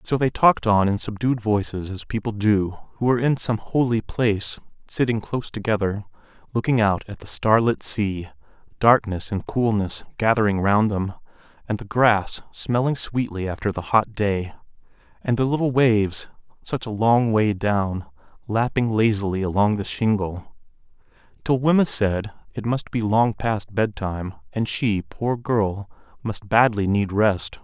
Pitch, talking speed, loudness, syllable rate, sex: 105 Hz, 155 wpm, -22 LUFS, 4.5 syllables/s, male